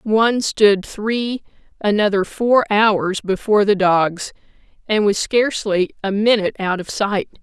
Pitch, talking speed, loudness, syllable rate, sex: 205 Hz, 135 wpm, -17 LUFS, 4.2 syllables/s, female